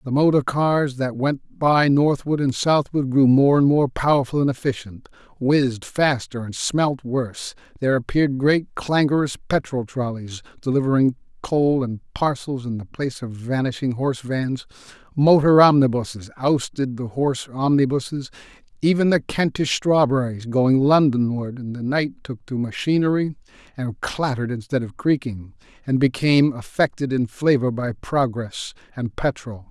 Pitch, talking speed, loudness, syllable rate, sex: 135 Hz, 140 wpm, -21 LUFS, 4.7 syllables/s, male